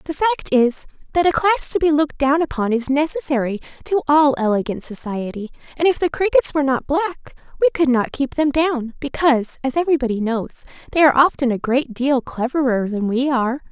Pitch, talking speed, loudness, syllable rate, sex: 275 Hz, 195 wpm, -19 LUFS, 5.8 syllables/s, female